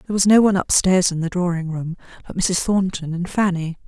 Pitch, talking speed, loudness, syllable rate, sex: 180 Hz, 230 wpm, -19 LUFS, 6.0 syllables/s, female